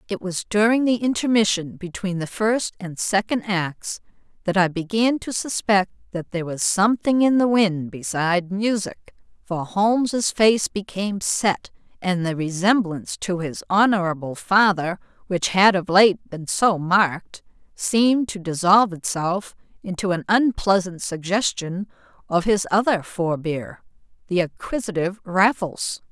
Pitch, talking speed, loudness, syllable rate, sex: 195 Hz, 135 wpm, -21 LUFS, 4.4 syllables/s, female